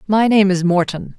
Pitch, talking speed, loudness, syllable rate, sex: 190 Hz, 200 wpm, -15 LUFS, 4.9 syllables/s, female